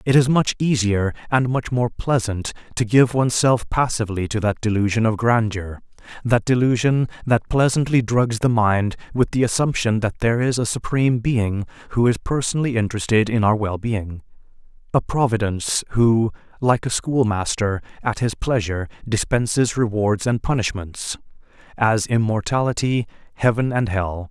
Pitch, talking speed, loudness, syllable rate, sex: 115 Hz, 145 wpm, -20 LUFS, 5.0 syllables/s, male